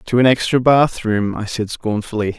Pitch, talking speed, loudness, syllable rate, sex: 115 Hz, 200 wpm, -17 LUFS, 4.8 syllables/s, male